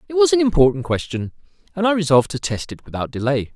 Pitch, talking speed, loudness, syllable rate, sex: 165 Hz, 220 wpm, -19 LUFS, 6.9 syllables/s, male